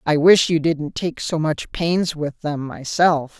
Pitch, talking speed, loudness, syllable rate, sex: 160 Hz, 195 wpm, -19 LUFS, 3.7 syllables/s, female